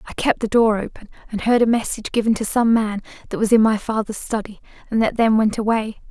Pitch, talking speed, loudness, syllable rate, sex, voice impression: 220 Hz, 235 wpm, -19 LUFS, 6.2 syllables/s, female, feminine, slightly young, slightly cute, slightly calm, friendly, slightly kind